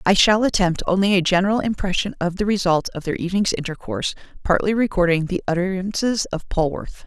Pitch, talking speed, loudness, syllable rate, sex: 190 Hz, 170 wpm, -20 LUFS, 6.1 syllables/s, female